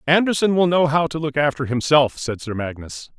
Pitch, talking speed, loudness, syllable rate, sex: 145 Hz, 205 wpm, -19 LUFS, 5.3 syllables/s, male